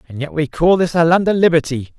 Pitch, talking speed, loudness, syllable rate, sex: 155 Hz, 270 wpm, -15 LUFS, 6.1 syllables/s, male